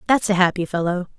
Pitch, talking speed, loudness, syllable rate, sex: 185 Hz, 205 wpm, -20 LUFS, 6.7 syllables/s, female